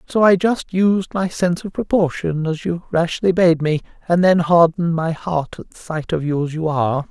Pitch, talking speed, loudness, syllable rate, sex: 170 Hz, 210 wpm, -18 LUFS, 4.8 syllables/s, male